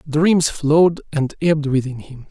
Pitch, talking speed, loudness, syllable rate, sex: 150 Hz, 155 wpm, -17 LUFS, 4.5 syllables/s, male